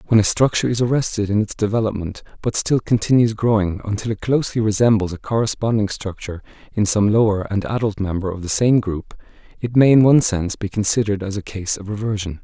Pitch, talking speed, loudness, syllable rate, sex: 105 Hz, 200 wpm, -19 LUFS, 6.3 syllables/s, male